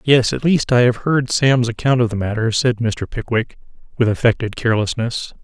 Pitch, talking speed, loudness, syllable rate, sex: 120 Hz, 190 wpm, -17 LUFS, 5.1 syllables/s, male